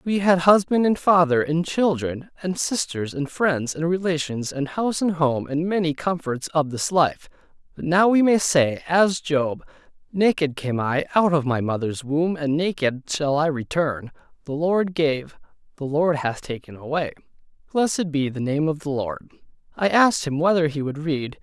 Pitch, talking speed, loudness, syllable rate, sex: 155 Hz, 180 wpm, -22 LUFS, 4.6 syllables/s, male